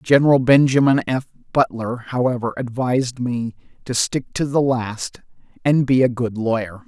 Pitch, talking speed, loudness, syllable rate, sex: 125 Hz, 150 wpm, -19 LUFS, 4.8 syllables/s, male